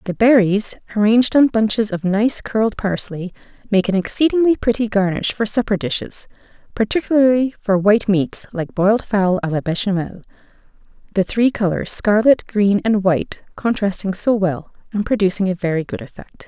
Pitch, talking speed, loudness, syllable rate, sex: 205 Hz, 155 wpm, -18 LUFS, 5.2 syllables/s, female